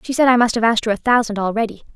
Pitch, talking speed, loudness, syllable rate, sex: 225 Hz, 305 wpm, -17 LUFS, 8.0 syllables/s, female